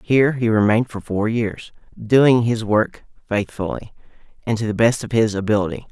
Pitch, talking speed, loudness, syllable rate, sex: 110 Hz, 175 wpm, -19 LUFS, 5.2 syllables/s, male